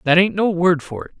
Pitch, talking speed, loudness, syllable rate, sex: 180 Hz, 300 wpm, -17 LUFS, 5.7 syllables/s, male